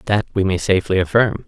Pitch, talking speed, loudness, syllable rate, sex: 100 Hz, 205 wpm, -18 LUFS, 6.6 syllables/s, male